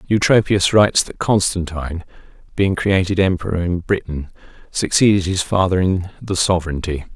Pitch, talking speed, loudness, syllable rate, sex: 95 Hz, 125 wpm, -18 LUFS, 5.2 syllables/s, male